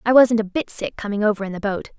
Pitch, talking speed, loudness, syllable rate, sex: 215 Hz, 300 wpm, -21 LUFS, 6.5 syllables/s, female